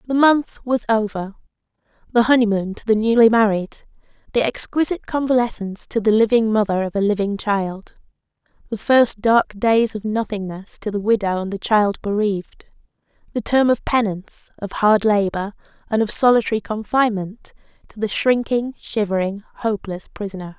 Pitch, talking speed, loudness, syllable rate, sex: 215 Hz, 145 wpm, -19 LUFS, 5.2 syllables/s, female